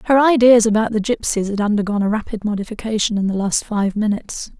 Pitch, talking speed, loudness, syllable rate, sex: 215 Hz, 195 wpm, -18 LUFS, 6.4 syllables/s, female